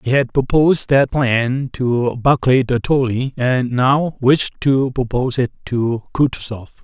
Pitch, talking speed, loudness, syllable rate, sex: 130 Hz, 150 wpm, -17 LUFS, 4.0 syllables/s, male